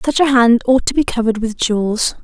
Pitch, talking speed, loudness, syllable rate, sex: 240 Hz, 240 wpm, -15 LUFS, 5.9 syllables/s, female